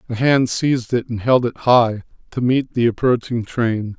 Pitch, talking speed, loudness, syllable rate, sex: 120 Hz, 195 wpm, -18 LUFS, 4.5 syllables/s, male